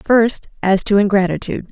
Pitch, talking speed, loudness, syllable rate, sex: 200 Hz, 140 wpm, -16 LUFS, 5.4 syllables/s, female